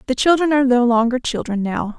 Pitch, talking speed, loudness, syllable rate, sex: 250 Hz, 210 wpm, -17 LUFS, 6.1 syllables/s, female